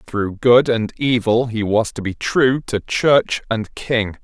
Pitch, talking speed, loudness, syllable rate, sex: 115 Hz, 185 wpm, -18 LUFS, 3.5 syllables/s, male